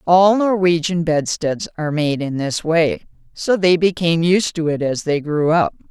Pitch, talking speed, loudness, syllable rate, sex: 165 Hz, 185 wpm, -17 LUFS, 4.6 syllables/s, female